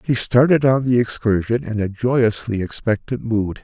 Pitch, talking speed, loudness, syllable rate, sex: 115 Hz, 165 wpm, -19 LUFS, 4.5 syllables/s, male